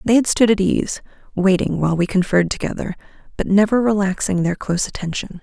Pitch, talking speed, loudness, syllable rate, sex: 195 Hz, 175 wpm, -18 LUFS, 6.1 syllables/s, female